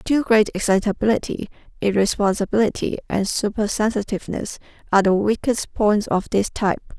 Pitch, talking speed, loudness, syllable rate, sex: 210 Hz, 110 wpm, -20 LUFS, 5.4 syllables/s, female